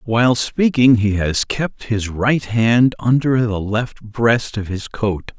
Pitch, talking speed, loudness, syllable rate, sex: 115 Hz, 165 wpm, -17 LUFS, 3.5 syllables/s, male